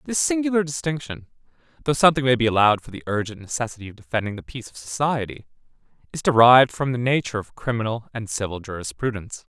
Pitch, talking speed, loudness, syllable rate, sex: 120 Hz, 175 wpm, -22 LUFS, 7.0 syllables/s, male